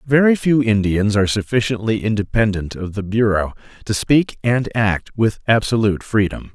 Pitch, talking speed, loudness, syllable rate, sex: 110 Hz, 145 wpm, -18 LUFS, 5.0 syllables/s, male